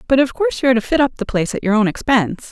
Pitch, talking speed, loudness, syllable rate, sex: 235 Hz, 335 wpm, -17 LUFS, 8.1 syllables/s, female